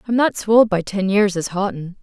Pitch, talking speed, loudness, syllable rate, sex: 200 Hz, 265 wpm, -18 LUFS, 5.5 syllables/s, female